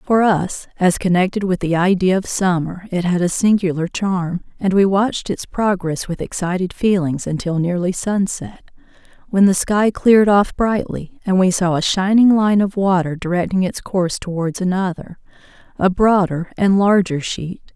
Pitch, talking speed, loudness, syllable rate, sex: 185 Hz, 165 wpm, -17 LUFS, 4.7 syllables/s, female